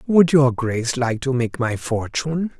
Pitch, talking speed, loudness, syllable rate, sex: 130 Hz, 185 wpm, -20 LUFS, 4.6 syllables/s, male